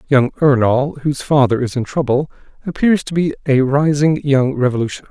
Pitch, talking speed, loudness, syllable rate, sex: 140 Hz, 165 wpm, -16 LUFS, 5.5 syllables/s, male